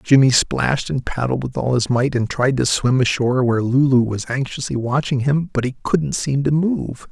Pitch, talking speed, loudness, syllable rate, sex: 130 Hz, 210 wpm, -19 LUFS, 5.0 syllables/s, male